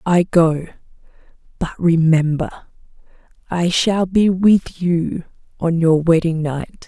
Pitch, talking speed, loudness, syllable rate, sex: 170 Hz, 115 wpm, -17 LUFS, 3.6 syllables/s, female